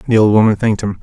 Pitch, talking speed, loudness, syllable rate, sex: 105 Hz, 295 wpm, -13 LUFS, 8.5 syllables/s, male